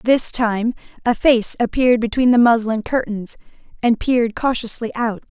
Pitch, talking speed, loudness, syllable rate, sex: 230 Hz, 145 wpm, -18 LUFS, 4.9 syllables/s, female